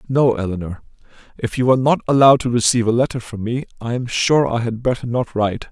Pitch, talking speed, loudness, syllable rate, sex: 120 Hz, 220 wpm, -18 LUFS, 6.6 syllables/s, male